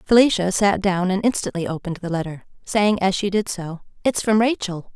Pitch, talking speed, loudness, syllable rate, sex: 195 Hz, 195 wpm, -21 LUFS, 5.4 syllables/s, female